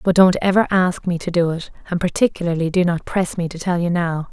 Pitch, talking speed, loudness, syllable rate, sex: 175 Hz, 250 wpm, -19 LUFS, 5.8 syllables/s, female